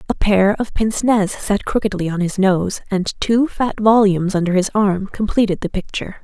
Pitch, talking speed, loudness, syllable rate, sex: 200 Hz, 190 wpm, -17 LUFS, 5.2 syllables/s, female